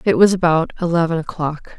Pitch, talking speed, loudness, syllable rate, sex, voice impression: 170 Hz, 170 wpm, -17 LUFS, 5.6 syllables/s, female, very feminine, adult-like, slightly intellectual, elegant, slightly sweet